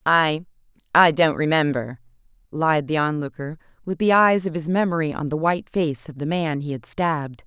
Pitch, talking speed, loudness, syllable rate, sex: 155 Hz, 175 wpm, -21 LUFS, 5.1 syllables/s, female